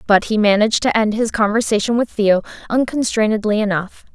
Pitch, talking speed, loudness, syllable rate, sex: 215 Hz, 160 wpm, -17 LUFS, 5.7 syllables/s, female